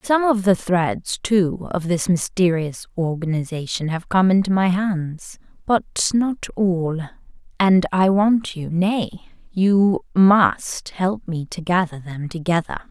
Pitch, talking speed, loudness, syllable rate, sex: 185 Hz, 135 wpm, -20 LUFS, 3.6 syllables/s, female